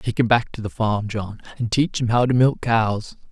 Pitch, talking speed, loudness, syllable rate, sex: 115 Hz, 255 wpm, -21 LUFS, 4.7 syllables/s, male